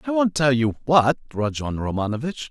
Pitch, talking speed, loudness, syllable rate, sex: 135 Hz, 170 wpm, -22 LUFS, 5.2 syllables/s, male